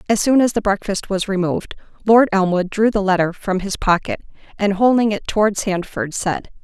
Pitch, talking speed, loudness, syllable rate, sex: 200 Hz, 190 wpm, -18 LUFS, 5.4 syllables/s, female